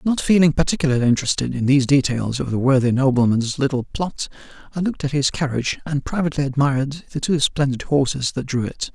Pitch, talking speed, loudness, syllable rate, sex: 140 Hz, 190 wpm, -20 LUFS, 6.3 syllables/s, male